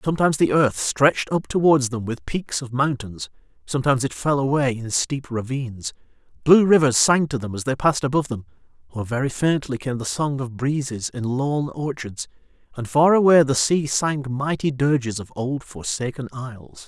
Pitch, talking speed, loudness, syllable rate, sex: 135 Hz, 180 wpm, -21 LUFS, 5.2 syllables/s, male